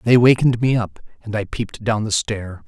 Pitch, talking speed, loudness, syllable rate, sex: 110 Hz, 225 wpm, -19 LUFS, 5.6 syllables/s, male